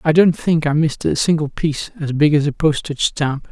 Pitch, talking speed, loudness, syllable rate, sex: 150 Hz, 240 wpm, -17 LUFS, 5.7 syllables/s, male